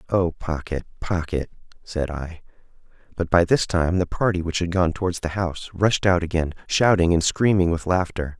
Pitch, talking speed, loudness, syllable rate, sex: 85 Hz, 180 wpm, -22 LUFS, 5.0 syllables/s, male